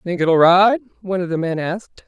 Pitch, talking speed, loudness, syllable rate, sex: 180 Hz, 230 wpm, -17 LUFS, 5.5 syllables/s, female